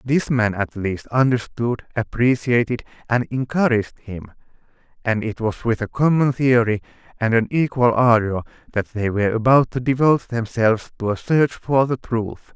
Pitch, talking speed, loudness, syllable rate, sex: 120 Hz, 160 wpm, -20 LUFS, 4.9 syllables/s, male